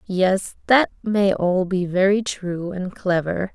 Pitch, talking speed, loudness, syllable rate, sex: 190 Hz, 150 wpm, -21 LUFS, 3.4 syllables/s, female